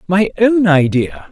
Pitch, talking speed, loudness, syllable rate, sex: 170 Hz, 135 wpm, -13 LUFS, 3.7 syllables/s, male